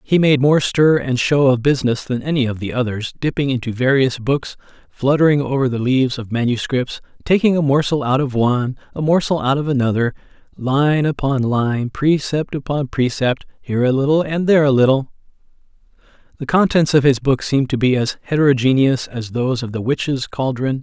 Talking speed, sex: 185 wpm, male